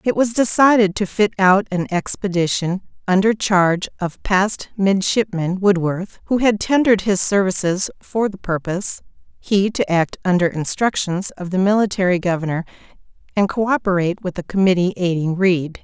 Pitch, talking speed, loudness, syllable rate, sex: 190 Hz, 145 wpm, -18 LUFS, 4.9 syllables/s, female